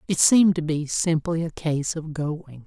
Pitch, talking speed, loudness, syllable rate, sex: 160 Hz, 205 wpm, -22 LUFS, 4.4 syllables/s, female